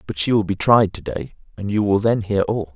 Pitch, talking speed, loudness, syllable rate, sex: 100 Hz, 260 wpm, -19 LUFS, 5.4 syllables/s, male